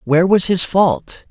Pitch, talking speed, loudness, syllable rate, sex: 180 Hz, 185 wpm, -14 LUFS, 4.2 syllables/s, male